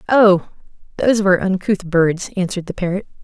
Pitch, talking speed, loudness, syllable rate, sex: 190 Hz, 150 wpm, -17 LUFS, 5.9 syllables/s, female